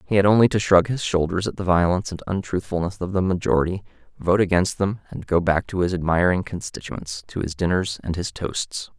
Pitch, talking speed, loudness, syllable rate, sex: 90 Hz, 205 wpm, -22 LUFS, 5.7 syllables/s, male